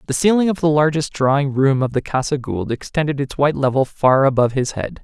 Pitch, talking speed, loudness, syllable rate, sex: 140 Hz, 225 wpm, -18 LUFS, 6.0 syllables/s, male